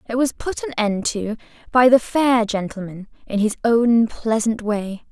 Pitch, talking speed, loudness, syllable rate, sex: 225 Hz, 175 wpm, -19 LUFS, 4.2 syllables/s, female